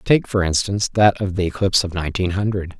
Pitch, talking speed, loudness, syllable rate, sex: 95 Hz, 215 wpm, -19 LUFS, 6.4 syllables/s, male